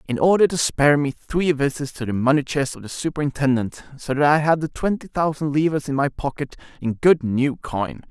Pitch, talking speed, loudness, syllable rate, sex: 145 Hz, 215 wpm, -21 LUFS, 5.5 syllables/s, male